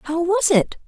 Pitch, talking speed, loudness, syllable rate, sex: 310 Hz, 205 wpm, -18 LUFS, 3.9 syllables/s, female